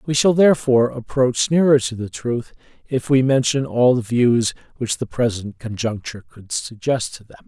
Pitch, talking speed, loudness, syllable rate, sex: 120 Hz, 175 wpm, -19 LUFS, 4.9 syllables/s, male